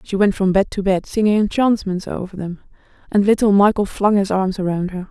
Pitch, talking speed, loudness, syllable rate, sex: 195 Hz, 210 wpm, -18 LUFS, 5.3 syllables/s, female